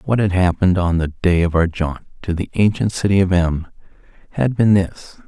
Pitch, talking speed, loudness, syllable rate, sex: 90 Hz, 205 wpm, -18 LUFS, 5.2 syllables/s, male